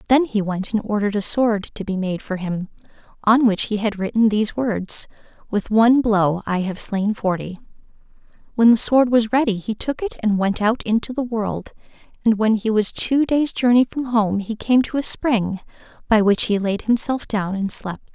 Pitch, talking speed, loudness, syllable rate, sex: 215 Hz, 205 wpm, -19 LUFS, 4.8 syllables/s, female